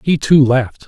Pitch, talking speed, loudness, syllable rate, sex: 135 Hz, 205 wpm, -13 LUFS, 5.2 syllables/s, male